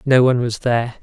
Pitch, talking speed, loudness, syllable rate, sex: 120 Hz, 235 wpm, -17 LUFS, 6.9 syllables/s, male